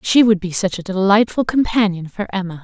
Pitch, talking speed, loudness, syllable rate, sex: 200 Hz, 205 wpm, -17 LUFS, 5.5 syllables/s, female